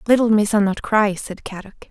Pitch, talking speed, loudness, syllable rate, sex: 210 Hz, 190 wpm, -18 LUFS, 5.8 syllables/s, female